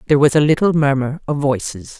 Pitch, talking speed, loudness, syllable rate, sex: 140 Hz, 210 wpm, -16 LUFS, 6.3 syllables/s, female